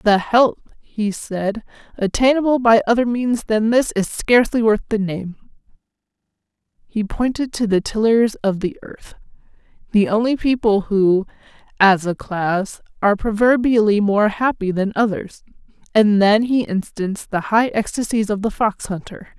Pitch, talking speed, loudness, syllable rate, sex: 215 Hz, 140 wpm, -18 LUFS, 4.5 syllables/s, female